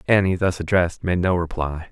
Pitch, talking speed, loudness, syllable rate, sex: 90 Hz, 190 wpm, -21 LUFS, 5.8 syllables/s, male